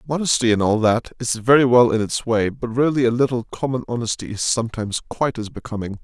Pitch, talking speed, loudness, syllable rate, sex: 120 Hz, 210 wpm, -20 LUFS, 6.3 syllables/s, male